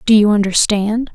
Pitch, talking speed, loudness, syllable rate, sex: 215 Hz, 155 wpm, -14 LUFS, 4.9 syllables/s, female